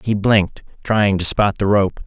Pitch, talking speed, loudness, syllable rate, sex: 100 Hz, 205 wpm, -17 LUFS, 4.5 syllables/s, male